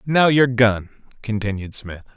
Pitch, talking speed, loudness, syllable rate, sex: 115 Hz, 140 wpm, -19 LUFS, 4.4 syllables/s, male